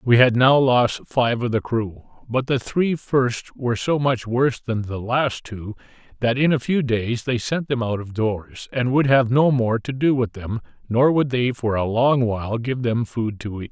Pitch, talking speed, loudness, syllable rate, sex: 120 Hz, 225 wpm, -21 LUFS, 4.4 syllables/s, male